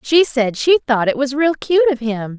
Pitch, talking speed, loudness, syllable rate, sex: 265 Hz, 250 wpm, -16 LUFS, 4.6 syllables/s, female